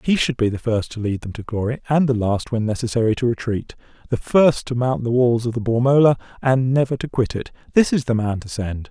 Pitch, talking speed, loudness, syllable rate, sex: 120 Hz, 250 wpm, -20 LUFS, 5.7 syllables/s, male